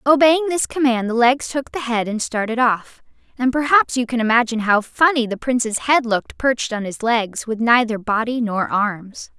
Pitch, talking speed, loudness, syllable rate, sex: 240 Hz, 200 wpm, -18 LUFS, 5.0 syllables/s, female